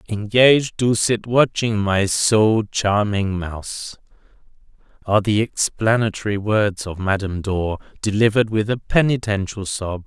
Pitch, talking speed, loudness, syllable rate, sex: 105 Hz, 120 wpm, -19 LUFS, 4.5 syllables/s, male